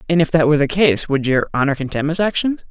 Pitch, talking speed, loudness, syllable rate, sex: 160 Hz, 265 wpm, -17 LUFS, 6.7 syllables/s, male